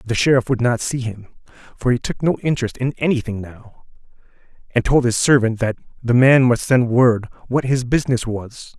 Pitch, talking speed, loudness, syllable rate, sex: 120 Hz, 200 wpm, -18 LUFS, 5.3 syllables/s, male